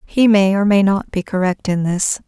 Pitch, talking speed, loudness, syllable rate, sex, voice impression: 195 Hz, 235 wpm, -16 LUFS, 4.8 syllables/s, female, very feminine, very adult-like, slightly middle-aged, thin, slightly relaxed, slightly weak, slightly bright, soft, slightly muffled, very fluent, slightly raspy, cute, very intellectual, very refreshing, very sincere, calm, friendly, reassuring, unique, very elegant, very sweet, slightly lively, very kind, slightly modest, light